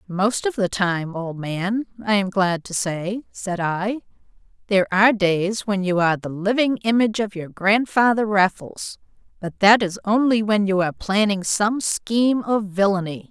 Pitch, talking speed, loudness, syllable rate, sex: 200 Hz, 170 wpm, -20 LUFS, 4.6 syllables/s, female